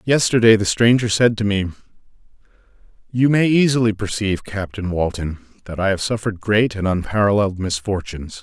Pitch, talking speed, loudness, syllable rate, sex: 105 Hz, 140 wpm, -18 LUFS, 5.8 syllables/s, male